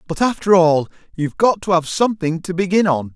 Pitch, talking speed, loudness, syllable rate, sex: 175 Hz, 210 wpm, -17 LUFS, 6.0 syllables/s, male